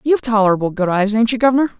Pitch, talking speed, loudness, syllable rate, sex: 225 Hz, 235 wpm, -16 LUFS, 8.0 syllables/s, female